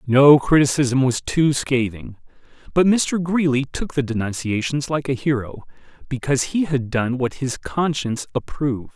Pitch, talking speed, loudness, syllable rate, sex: 135 Hz, 145 wpm, -20 LUFS, 4.7 syllables/s, male